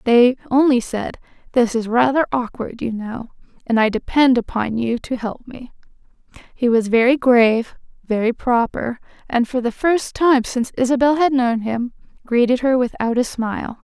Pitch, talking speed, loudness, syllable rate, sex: 245 Hz, 165 wpm, -18 LUFS, 4.8 syllables/s, female